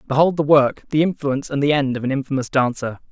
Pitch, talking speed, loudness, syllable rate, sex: 140 Hz, 230 wpm, -19 LUFS, 6.4 syllables/s, male